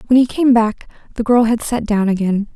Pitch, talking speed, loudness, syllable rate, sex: 225 Hz, 235 wpm, -16 LUFS, 5.4 syllables/s, female